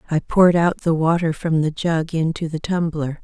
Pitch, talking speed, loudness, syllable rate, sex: 165 Hz, 205 wpm, -19 LUFS, 5.0 syllables/s, female